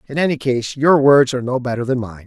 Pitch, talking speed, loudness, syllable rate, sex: 130 Hz, 265 wpm, -16 LUFS, 6.3 syllables/s, male